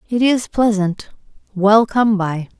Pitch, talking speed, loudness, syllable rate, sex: 210 Hz, 140 wpm, -16 LUFS, 3.6 syllables/s, female